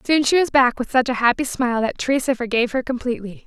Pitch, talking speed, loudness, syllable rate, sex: 250 Hz, 245 wpm, -19 LUFS, 6.9 syllables/s, female